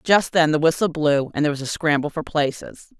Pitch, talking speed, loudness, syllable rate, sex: 155 Hz, 240 wpm, -20 LUFS, 5.8 syllables/s, female